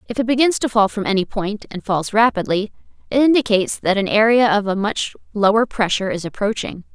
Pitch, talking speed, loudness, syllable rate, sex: 210 Hz, 200 wpm, -18 LUFS, 5.9 syllables/s, female